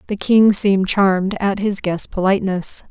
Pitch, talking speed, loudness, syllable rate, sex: 195 Hz, 165 wpm, -17 LUFS, 4.9 syllables/s, female